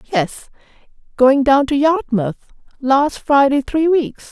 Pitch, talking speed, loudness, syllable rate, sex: 275 Hz, 125 wpm, -16 LUFS, 4.7 syllables/s, female